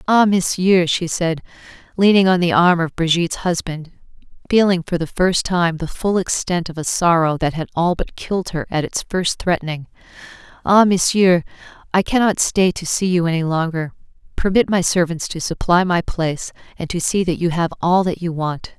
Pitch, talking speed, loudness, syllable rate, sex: 175 Hz, 190 wpm, -18 LUFS, 5.1 syllables/s, female